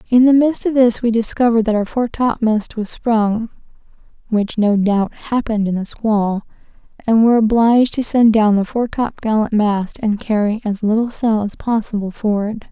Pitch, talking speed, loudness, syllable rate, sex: 220 Hz, 185 wpm, -16 LUFS, 4.6 syllables/s, female